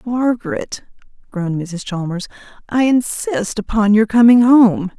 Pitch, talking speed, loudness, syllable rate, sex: 215 Hz, 120 wpm, -15 LUFS, 4.2 syllables/s, female